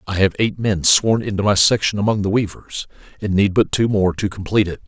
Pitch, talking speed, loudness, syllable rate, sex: 100 Hz, 235 wpm, -17 LUFS, 5.8 syllables/s, male